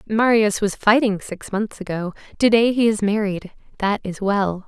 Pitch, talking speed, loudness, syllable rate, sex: 205 Hz, 180 wpm, -20 LUFS, 4.5 syllables/s, female